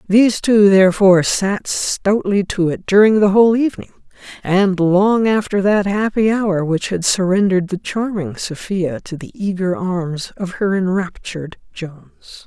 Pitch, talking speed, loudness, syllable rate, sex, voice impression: 190 Hz, 150 wpm, -16 LUFS, 4.5 syllables/s, female, feminine, middle-aged, slightly relaxed, bright, slightly hard, slightly muffled, slightly raspy, intellectual, friendly, reassuring, kind, slightly modest